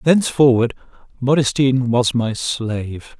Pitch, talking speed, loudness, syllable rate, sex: 125 Hz, 95 wpm, -17 LUFS, 4.6 syllables/s, male